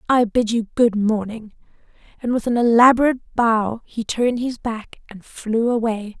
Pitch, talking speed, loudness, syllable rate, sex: 230 Hz, 165 wpm, -19 LUFS, 4.8 syllables/s, female